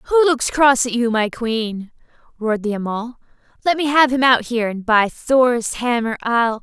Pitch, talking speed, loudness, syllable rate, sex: 240 Hz, 190 wpm, -18 LUFS, 4.6 syllables/s, female